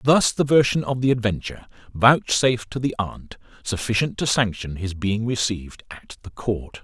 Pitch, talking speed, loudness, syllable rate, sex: 115 Hz, 160 wpm, -22 LUFS, 4.9 syllables/s, male